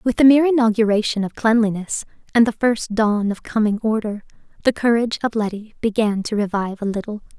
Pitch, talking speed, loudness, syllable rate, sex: 220 Hz, 180 wpm, -19 LUFS, 6.0 syllables/s, female